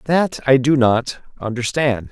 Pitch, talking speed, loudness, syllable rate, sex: 130 Hz, 140 wpm, -17 LUFS, 4.1 syllables/s, male